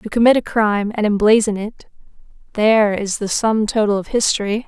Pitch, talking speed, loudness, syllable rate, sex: 215 Hz, 180 wpm, -17 LUFS, 5.5 syllables/s, female